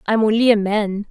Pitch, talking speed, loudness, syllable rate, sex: 210 Hz, 215 wpm, -17 LUFS, 5.1 syllables/s, female